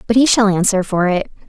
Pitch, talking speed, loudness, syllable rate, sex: 205 Hz, 245 wpm, -15 LUFS, 5.9 syllables/s, female